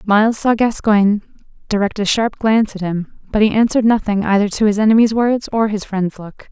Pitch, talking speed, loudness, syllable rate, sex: 210 Hz, 205 wpm, -16 LUFS, 5.7 syllables/s, female